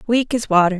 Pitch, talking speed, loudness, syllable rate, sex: 215 Hz, 230 wpm, -17 LUFS, 5.7 syllables/s, female